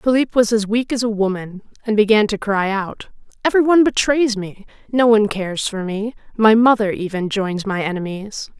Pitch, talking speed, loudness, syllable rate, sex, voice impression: 215 Hz, 180 wpm, -18 LUFS, 5.3 syllables/s, female, very feminine, young, thin, tensed, slightly powerful, bright, soft, very clear, fluent, cute, intellectual, very refreshing, sincere, calm, very friendly, very reassuring, slightly unique, elegant, slightly wild, sweet, slightly lively, kind, slightly modest, light